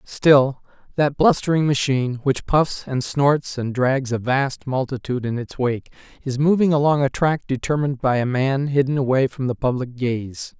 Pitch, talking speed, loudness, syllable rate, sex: 135 Hz, 175 wpm, -20 LUFS, 4.7 syllables/s, male